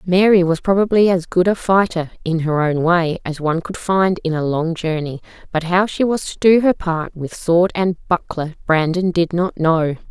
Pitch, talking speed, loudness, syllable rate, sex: 175 Hz, 210 wpm, -17 LUFS, 4.6 syllables/s, female